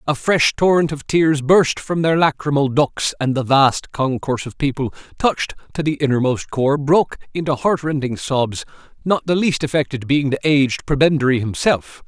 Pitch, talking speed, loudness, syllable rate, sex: 140 Hz, 170 wpm, -18 LUFS, 4.9 syllables/s, male